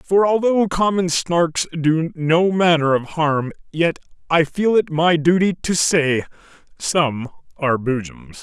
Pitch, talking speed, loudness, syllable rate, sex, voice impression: 165 Hz, 140 wpm, -18 LUFS, 3.7 syllables/s, male, masculine, very middle-aged, slightly thick, tensed, slightly powerful, bright, slightly hard, clear, slightly halting, cool, slightly intellectual, very refreshing, sincere, calm, mature, friendly, reassuring, very unique, slightly elegant, wild, slightly sweet, very lively, kind, intense